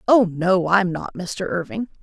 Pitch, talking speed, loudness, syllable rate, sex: 185 Hz, 180 wpm, -21 LUFS, 4.2 syllables/s, female